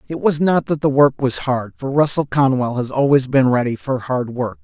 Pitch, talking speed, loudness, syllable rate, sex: 135 Hz, 235 wpm, -17 LUFS, 5.0 syllables/s, male